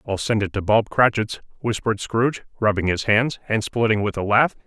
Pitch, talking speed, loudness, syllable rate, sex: 110 Hz, 205 wpm, -21 LUFS, 5.6 syllables/s, male